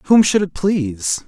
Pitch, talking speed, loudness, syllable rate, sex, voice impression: 170 Hz, 190 wpm, -17 LUFS, 4.1 syllables/s, male, masculine, adult-like, tensed, slightly powerful, bright, soft, fluent, cool, intellectual, refreshing, friendly, wild, lively, slightly kind